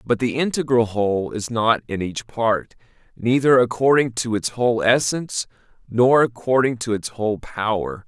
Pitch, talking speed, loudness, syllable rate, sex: 115 Hz, 155 wpm, -20 LUFS, 4.8 syllables/s, male